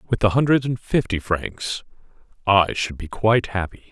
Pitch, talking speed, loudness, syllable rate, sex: 105 Hz, 170 wpm, -21 LUFS, 4.7 syllables/s, male